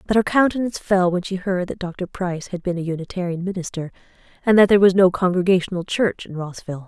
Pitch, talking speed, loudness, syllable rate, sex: 185 Hz, 210 wpm, -20 LUFS, 6.5 syllables/s, female